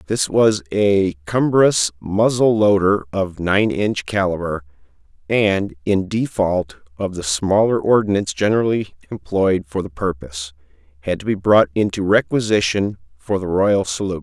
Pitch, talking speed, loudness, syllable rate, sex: 95 Hz, 130 wpm, -18 LUFS, 4.4 syllables/s, male